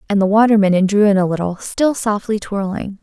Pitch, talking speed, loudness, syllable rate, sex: 205 Hz, 220 wpm, -16 LUFS, 5.6 syllables/s, female